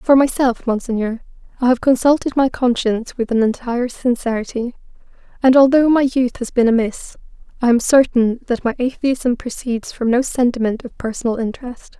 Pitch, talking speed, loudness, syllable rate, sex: 245 Hz, 160 wpm, -17 LUFS, 5.3 syllables/s, female